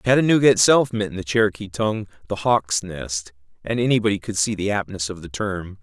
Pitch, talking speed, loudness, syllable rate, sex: 100 Hz, 195 wpm, -21 LUFS, 5.8 syllables/s, male